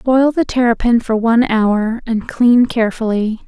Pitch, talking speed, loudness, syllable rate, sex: 235 Hz, 155 wpm, -15 LUFS, 4.6 syllables/s, female